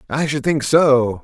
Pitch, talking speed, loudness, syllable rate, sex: 140 Hz, 195 wpm, -16 LUFS, 3.8 syllables/s, male